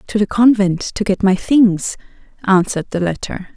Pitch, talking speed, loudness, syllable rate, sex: 200 Hz, 170 wpm, -16 LUFS, 4.9 syllables/s, female